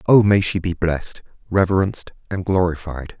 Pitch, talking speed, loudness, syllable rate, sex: 90 Hz, 150 wpm, -20 LUFS, 4.9 syllables/s, male